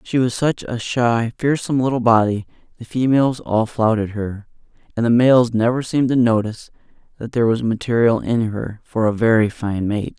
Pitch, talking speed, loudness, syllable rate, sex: 115 Hz, 185 wpm, -18 LUFS, 5.3 syllables/s, male